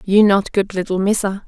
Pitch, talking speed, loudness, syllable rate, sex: 195 Hz, 205 wpm, -17 LUFS, 5.2 syllables/s, female